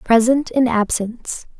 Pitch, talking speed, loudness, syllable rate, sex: 235 Hz, 115 wpm, -17 LUFS, 4.3 syllables/s, female